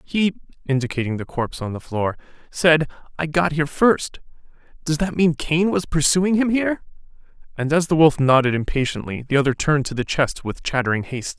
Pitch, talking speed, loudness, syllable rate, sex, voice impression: 150 Hz, 185 wpm, -20 LUFS, 5.7 syllables/s, male, very masculine, very adult-like, very middle-aged, very thick, tensed, powerful, bright, hard, slightly muffled, fluent, cool, very intellectual, slightly refreshing, sincere, calm, very mature, friendly, reassuring, slightly unique, slightly wild, sweet, lively, kind